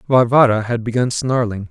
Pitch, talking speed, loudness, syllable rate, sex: 120 Hz, 140 wpm, -16 LUFS, 5.2 syllables/s, male